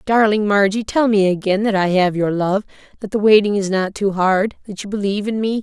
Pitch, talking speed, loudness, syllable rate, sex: 200 Hz, 235 wpm, -17 LUFS, 5.6 syllables/s, female